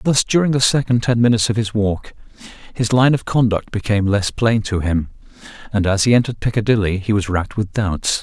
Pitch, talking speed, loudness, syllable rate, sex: 110 Hz, 205 wpm, -17 LUFS, 5.9 syllables/s, male